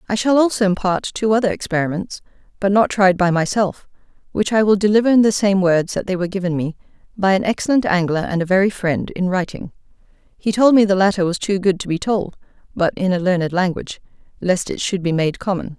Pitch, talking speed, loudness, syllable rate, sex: 195 Hz, 215 wpm, -18 LUFS, 6.0 syllables/s, female